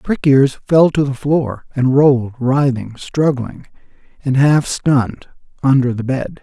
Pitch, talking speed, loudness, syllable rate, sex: 135 Hz, 150 wpm, -15 LUFS, 4.0 syllables/s, male